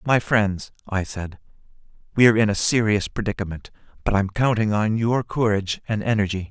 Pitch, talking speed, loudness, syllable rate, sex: 105 Hz, 155 wpm, -22 LUFS, 5.3 syllables/s, male